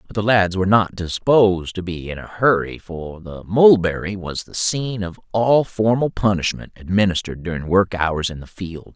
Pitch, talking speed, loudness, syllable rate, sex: 95 Hz, 190 wpm, -19 LUFS, 5.0 syllables/s, male